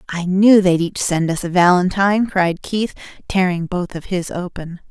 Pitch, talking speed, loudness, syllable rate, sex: 180 Hz, 185 wpm, -17 LUFS, 4.6 syllables/s, female